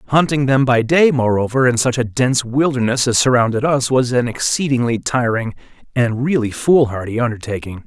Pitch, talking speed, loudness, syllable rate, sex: 125 Hz, 160 wpm, -16 LUFS, 5.2 syllables/s, male